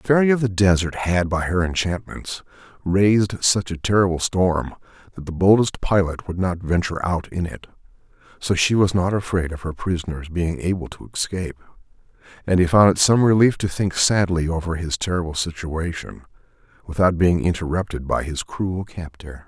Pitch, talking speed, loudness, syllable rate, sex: 90 Hz, 175 wpm, -20 LUFS, 5.2 syllables/s, male